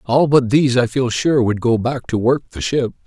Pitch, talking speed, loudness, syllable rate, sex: 125 Hz, 255 wpm, -17 LUFS, 5.2 syllables/s, male